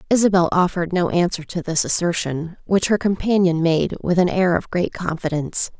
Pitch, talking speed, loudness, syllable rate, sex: 175 Hz, 175 wpm, -20 LUFS, 5.3 syllables/s, female